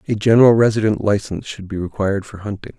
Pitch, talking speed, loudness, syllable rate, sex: 105 Hz, 195 wpm, -17 LUFS, 7.0 syllables/s, male